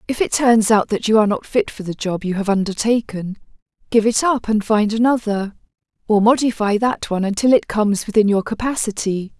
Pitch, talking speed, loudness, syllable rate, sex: 215 Hz, 200 wpm, -18 LUFS, 5.6 syllables/s, female